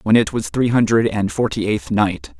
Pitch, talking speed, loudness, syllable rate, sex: 105 Hz, 225 wpm, -18 LUFS, 4.8 syllables/s, male